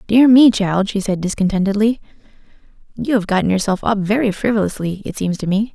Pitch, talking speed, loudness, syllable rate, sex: 205 Hz, 180 wpm, -16 LUFS, 5.9 syllables/s, female